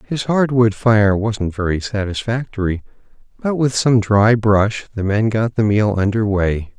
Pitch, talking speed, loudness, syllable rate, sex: 110 Hz, 170 wpm, -17 LUFS, 4.2 syllables/s, male